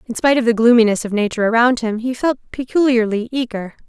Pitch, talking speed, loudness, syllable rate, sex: 235 Hz, 200 wpm, -16 LUFS, 6.7 syllables/s, female